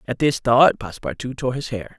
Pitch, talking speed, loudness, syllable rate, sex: 125 Hz, 210 wpm, -20 LUFS, 5.4 syllables/s, male